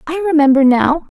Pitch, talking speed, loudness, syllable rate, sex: 300 Hz, 150 wpm, -12 LUFS, 5.4 syllables/s, female